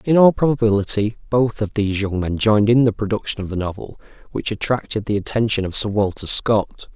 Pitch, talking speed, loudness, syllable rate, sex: 105 Hz, 200 wpm, -19 LUFS, 5.7 syllables/s, male